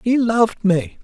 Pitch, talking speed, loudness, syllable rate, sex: 205 Hz, 175 wpm, -17 LUFS, 4.4 syllables/s, male